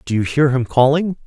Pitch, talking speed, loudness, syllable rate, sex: 135 Hz, 240 wpm, -16 LUFS, 5.4 syllables/s, male